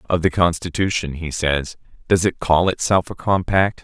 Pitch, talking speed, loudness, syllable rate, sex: 85 Hz, 170 wpm, -19 LUFS, 4.7 syllables/s, male